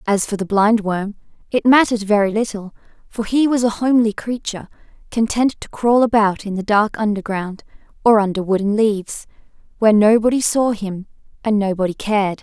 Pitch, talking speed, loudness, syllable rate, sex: 215 Hz, 165 wpm, -17 LUFS, 5.6 syllables/s, female